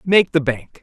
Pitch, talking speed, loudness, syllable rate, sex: 175 Hz, 220 wpm, -18 LUFS, 4.1 syllables/s, female